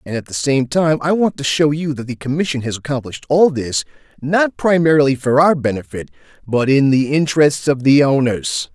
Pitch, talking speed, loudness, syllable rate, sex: 140 Hz, 200 wpm, -16 LUFS, 5.3 syllables/s, male